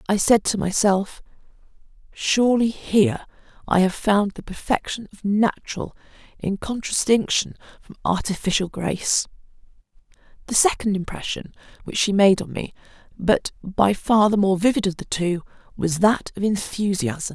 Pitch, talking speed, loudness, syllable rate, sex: 200 Hz, 135 wpm, -21 LUFS, 4.8 syllables/s, female